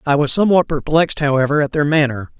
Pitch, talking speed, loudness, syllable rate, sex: 150 Hz, 200 wpm, -16 LUFS, 6.7 syllables/s, male